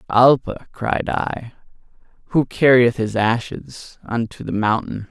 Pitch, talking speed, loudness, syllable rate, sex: 115 Hz, 120 wpm, -19 LUFS, 3.8 syllables/s, male